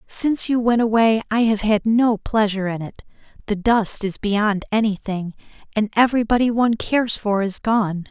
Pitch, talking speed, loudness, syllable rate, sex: 215 Hz, 165 wpm, -19 LUFS, 5.2 syllables/s, female